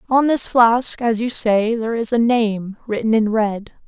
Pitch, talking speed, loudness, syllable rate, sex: 225 Hz, 200 wpm, -17 LUFS, 4.3 syllables/s, female